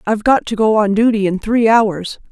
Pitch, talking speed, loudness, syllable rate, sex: 215 Hz, 235 wpm, -14 LUFS, 5.2 syllables/s, female